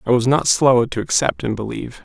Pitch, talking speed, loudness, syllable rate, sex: 120 Hz, 235 wpm, -18 LUFS, 5.8 syllables/s, male